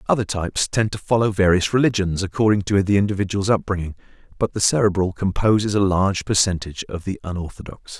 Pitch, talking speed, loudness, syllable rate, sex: 100 Hz, 150 wpm, -20 LUFS, 6.3 syllables/s, male